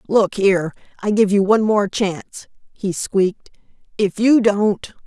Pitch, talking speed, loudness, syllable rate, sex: 200 Hz, 155 wpm, -18 LUFS, 4.5 syllables/s, female